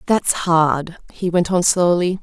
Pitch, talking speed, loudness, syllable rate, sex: 175 Hz, 160 wpm, -17 LUFS, 3.6 syllables/s, female